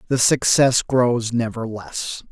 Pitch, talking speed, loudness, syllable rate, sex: 120 Hz, 130 wpm, -19 LUFS, 3.4 syllables/s, male